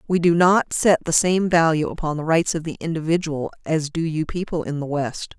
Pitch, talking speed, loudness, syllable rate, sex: 160 Hz, 225 wpm, -21 LUFS, 5.1 syllables/s, female